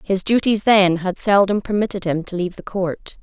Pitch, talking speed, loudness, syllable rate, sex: 195 Hz, 205 wpm, -18 LUFS, 5.2 syllables/s, female